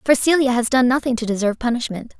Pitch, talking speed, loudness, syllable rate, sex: 245 Hz, 220 wpm, -19 LUFS, 6.7 syllables/s, female